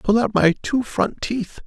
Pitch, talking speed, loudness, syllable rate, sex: 195 Hz, 215 wpm, -20 LUFS, 4.1 syllables/s, male